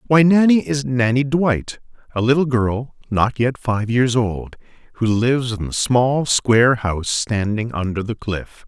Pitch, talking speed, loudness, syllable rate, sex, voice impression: 120 Hz, 160 wpm, -18 LUFS, 4.3 syllables/s, male, masculine, middle-aged, thick, tensed, powerful, dark, clear, cool, intellectual, calm, mature, wild, strict